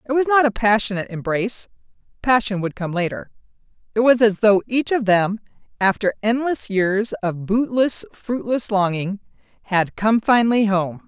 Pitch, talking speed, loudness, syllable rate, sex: 215 Hz, 140 wpm, -19 LUFS, 4.9 syllables/s, female